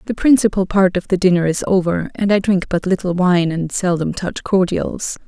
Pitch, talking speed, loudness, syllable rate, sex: 185 Hz, 205 wpm, -17 LUFS, 5.0 syllables/s, female